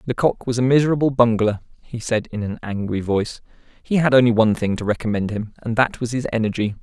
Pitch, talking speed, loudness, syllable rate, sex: 115 Hz, 210 wpm, -20 LUFS, 6.2 syllables/s, male